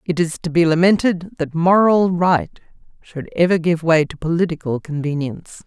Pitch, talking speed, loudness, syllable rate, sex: 165 Hz, 160 wpm, -17 LUFS, 4.9 syllables/s, female